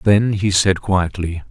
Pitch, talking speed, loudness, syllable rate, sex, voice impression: 95 Hz, 160 wpm, -17 LUFS, 3.7 syllables/s, male, masculine, adult-like, slightly thick, slightly fluent, slightly refreshing, sincere, calm